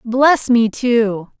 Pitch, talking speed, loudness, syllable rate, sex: 235 Hz, 130 wpm, -15 LUFS, 2.4 syllables/s, female